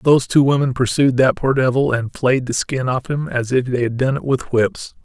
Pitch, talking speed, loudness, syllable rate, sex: 130 Hz, 250 wpm, -18 LUFS, 5.1 syllables/s, male